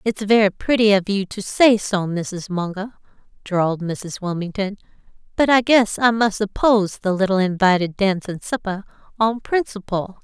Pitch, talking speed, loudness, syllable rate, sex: 200 Hz, 160 wpm, -19 LUFS, 4.8 syllables/s, female